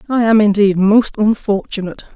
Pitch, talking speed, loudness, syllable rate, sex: 210 Hz, 140 wpm, -14 LUFS, 5.2 syllables/s, female